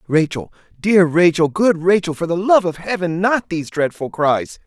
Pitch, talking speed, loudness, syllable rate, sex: 170 Hz, 180 wpm, -17 LUFS, 4.8 syllables/s, male